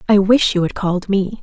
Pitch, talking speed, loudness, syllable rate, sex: 195 Hz, 255 wpm, -16 LUFS, 5.6 syllables/s, female